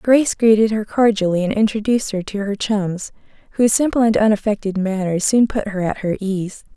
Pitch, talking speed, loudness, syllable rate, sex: 210 Hz, 185 wpm, -18 LUFS, 5.6 syllables/s, female